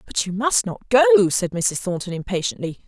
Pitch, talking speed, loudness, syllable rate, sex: 205 Hz, 190 wpm, -20 LUFS, 4.9 syllables/s, female